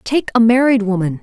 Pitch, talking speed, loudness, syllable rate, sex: 225 Hz, 195 wpm, -14 LUFS, 5.2 syllables/s, female